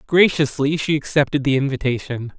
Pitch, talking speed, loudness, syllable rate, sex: 140 Hz, 125 wpm, -19 LUFS, 5.4 syllables/s, male